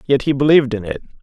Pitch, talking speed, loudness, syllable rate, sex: 135 Hz, 245 wpm, -16 LUFS, 7.9 syllables/s, male